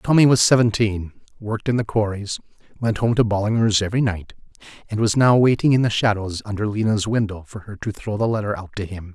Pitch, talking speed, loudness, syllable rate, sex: 105 Hz, 210 wpm, -20 LUFS, 6.1 syllables/s, male